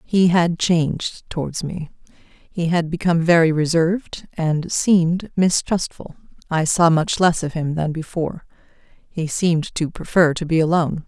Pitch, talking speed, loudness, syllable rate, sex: 165 Hz, 150 wpm, -19 LUFS, 4.5 syllables/s, female